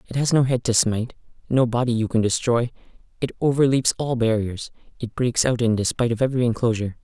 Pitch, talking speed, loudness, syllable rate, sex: 120 Hz, 195 wpm, -21 LUFS, 6.4 syllables/s, male